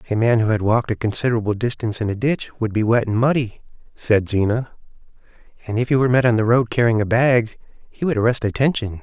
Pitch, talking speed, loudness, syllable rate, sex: 115 Hz, 220 wpm, -19 LUFS, 6.6 syllables/s, male